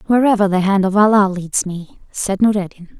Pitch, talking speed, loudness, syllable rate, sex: 195 Hz, 180 wpm, -16 LUFS, 5.1 syllables/s, female